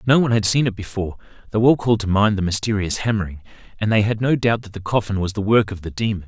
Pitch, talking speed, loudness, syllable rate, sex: 105 Hz, 270 wpm, -20 LUFS, 7.0 syllables/s, male